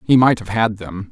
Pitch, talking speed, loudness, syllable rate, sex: 105 Hz, 270 wpm, -17 LUFS, 5.0 syllables/s, male